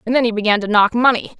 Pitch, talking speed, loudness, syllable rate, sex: 225 Hz, 300 wpm, -15 LUFS, 7.4 syllables/s, female